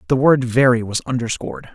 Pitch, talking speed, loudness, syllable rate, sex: 125 Hz, 170 wpm, -17 LUFS, 6.0 syllables/s, male